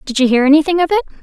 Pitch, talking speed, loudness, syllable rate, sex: 290 Hz, 295 wpm, -13 LUFS, 7.9 syllables/s, female